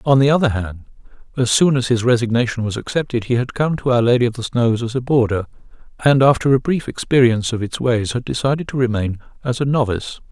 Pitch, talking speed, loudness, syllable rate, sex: 120 Hz, 220 wpm, -18 LUFS, 6.2 syllables/s, male